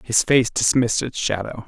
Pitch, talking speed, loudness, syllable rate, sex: 120 Hz, 180 wpm, -19 LUFS, 5.2 syllables/s, male